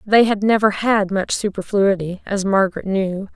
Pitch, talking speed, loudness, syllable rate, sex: 200 Hz, 160 wpm, -18 LUFS, 4.7 syllables/s, female